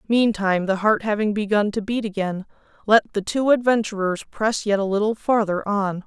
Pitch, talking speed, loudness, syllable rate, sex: 210 Hz, 180 wpm, -21 LUFS, 5.3 syllables/s, female